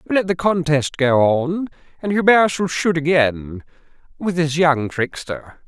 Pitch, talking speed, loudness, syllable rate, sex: 160 Hz, 150 wpm, -18 LUFS, 3.9 syllables/s, male